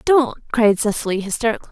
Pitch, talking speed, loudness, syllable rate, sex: 225 Hz, 140 wpm, -19 LUFS, 6.6 syllables/s, female